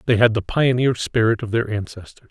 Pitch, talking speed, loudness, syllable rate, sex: 110 Hz, 210 wpm, -19 LUFS, 5.6 syllables/s, male